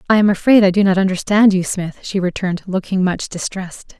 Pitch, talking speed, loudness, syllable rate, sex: 190 Hz, 210 wpm, -16 LUFS, 5.9 syllables/s, female